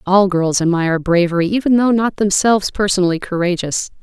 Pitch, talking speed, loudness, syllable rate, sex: 190 Hz, 150 wpm, -16 LUFS, 5.8 syllables/s, female